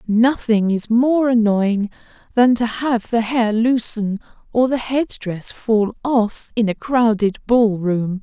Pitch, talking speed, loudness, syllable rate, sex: 225 Hz, 155 wpm, -18 LUFS, 3.5 syllables/s, female